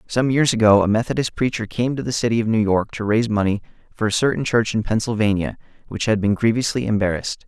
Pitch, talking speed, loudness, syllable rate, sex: 110 Hz, 215 wpm, -20 LUFS, 6.4 syllables/s, male